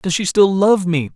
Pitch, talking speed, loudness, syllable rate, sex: 185 Hz, 260 wpm, -15 LUFS, 4.6 syllables/s, male